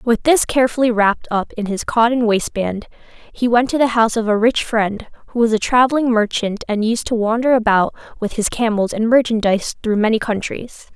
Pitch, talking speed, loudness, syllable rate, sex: 225 Hz, 195 wpm, -17 LUFS, 5.5 syllables/s, female